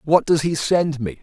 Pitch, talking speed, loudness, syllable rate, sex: 150 Hz, 245 wpm, -19 LUFS, 4.6 syllables/s, male